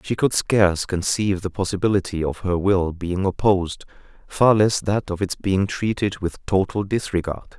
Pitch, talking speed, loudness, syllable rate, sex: 95 Hz, 165 wpm, -21 LUFS, 5.0 syllables/s, male